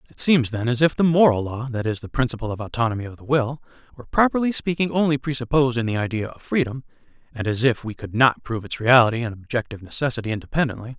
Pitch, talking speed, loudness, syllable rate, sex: 125 Hz, 220 wpm, -22 LUFS, 7.0 syllables/s, male